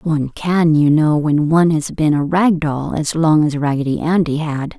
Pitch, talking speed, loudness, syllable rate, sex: 155 Hz, 215 wpm, -16 LUFS, 4.7 syllables/s, female